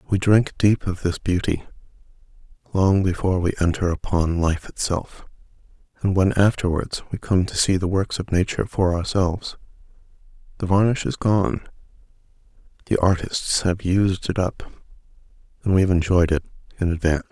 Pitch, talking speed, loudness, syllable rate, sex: 95 Hz, 150 wpm, -21 LUFS, 5.1 syllables/s, male